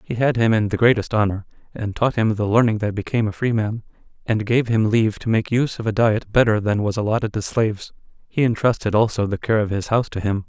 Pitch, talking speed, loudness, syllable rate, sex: 110 Hz, 245 wpm, -20 LUFS, 6.2 syllables/s, male